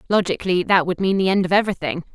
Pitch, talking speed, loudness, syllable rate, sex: 185 Hz, 225 wpm, -19 LUFS, 7.4 syllables/s, female